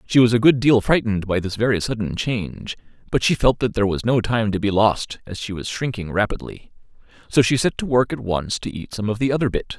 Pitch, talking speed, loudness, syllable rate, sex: 110 Hz, 250 wpm, -20 LUFS, 5.9 syllables/s, male